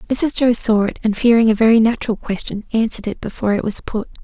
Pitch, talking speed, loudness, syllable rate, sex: 220 Hz, 225 wpm, -17 LUFS, 6.6 syllables/s, female